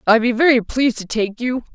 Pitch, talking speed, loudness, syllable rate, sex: 240 Hz, 240 wpm, -17 LUFS, 5.9 syllables/s, female